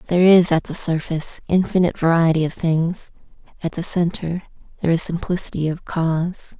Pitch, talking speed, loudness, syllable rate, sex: 170 Hz, 155 wpm, -20 LUFS, 5.7 syllables/s, female